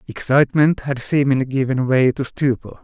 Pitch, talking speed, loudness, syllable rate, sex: 135 Hz, 150 wpm, -18 LUFS, 5.5 syllables/s, male